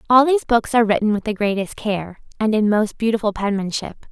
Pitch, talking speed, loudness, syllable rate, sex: 215 Hz, 205 wpm, -19 LUFS, 6.0 syllables/s, female